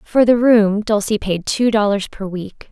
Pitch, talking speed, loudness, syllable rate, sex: 210 Hz, 200 wpm, -16 LUFS, 4.2 syllables/s, female